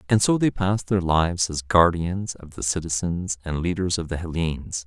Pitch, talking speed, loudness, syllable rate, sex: 85 Hz, 195 wpm, -23 LUFS, 5.2 syllables/s, male